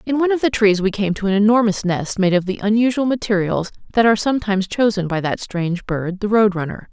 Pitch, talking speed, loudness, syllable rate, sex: 205 Hz, 235 wpm, -18 LUFS, 6.3 syllables/s, female